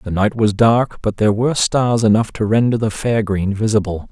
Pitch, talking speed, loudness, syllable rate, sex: 110 Hz, 220 wpm, -16 LUFS, 5.2 syllables/s, male